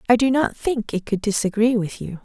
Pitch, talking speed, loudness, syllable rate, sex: 225 Hz, 240 wpm, -21 LUFS, 5.4 syllables/s, female